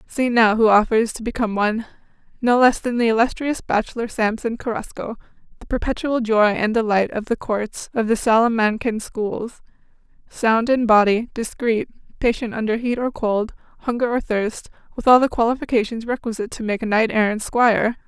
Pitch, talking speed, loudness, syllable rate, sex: 225 Hz, 165 wpm, -20 LUFS, 5.3 syllables/s, female